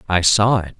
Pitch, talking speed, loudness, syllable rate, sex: 95 Hz, 225 wpm, -16 LUFS, 5.1 syllables/s, male